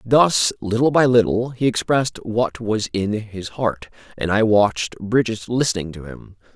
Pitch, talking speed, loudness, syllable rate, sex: 110 Hz, 165 wpm, -19 LUFS, 4.6 syllables/s, male